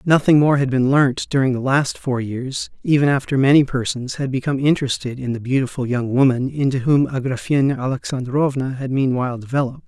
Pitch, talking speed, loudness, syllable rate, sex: 130 Hz, 175 wpm, -19 LUFS, 5.8 syllables/s, male